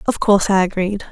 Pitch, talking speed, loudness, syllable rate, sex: 195 Hz, 215 wpm, -16 LUFS, 6.5 syllables/s, female